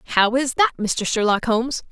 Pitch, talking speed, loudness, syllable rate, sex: 240 Hz, 190 wpm, -20 LUFS, 5.8 syllables/s, female